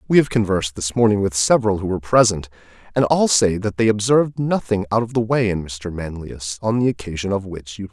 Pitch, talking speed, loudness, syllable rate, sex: 105 Hz, 235 wpm, -19 LUFS, 6.1 syllables/s, male